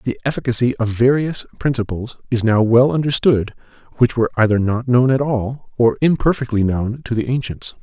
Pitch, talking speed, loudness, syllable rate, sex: 120 Hz, 170 wpm, -17 LUFS, 5.4 syllables/s, male